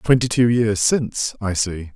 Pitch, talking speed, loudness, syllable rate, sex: 110 Hz, 185 wpm, -19 LUFS, 4.3 syllables/s, male